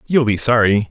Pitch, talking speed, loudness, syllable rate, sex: 115 Hz, 200 wpm, -15 LUFS, 5.3 syllables/s, male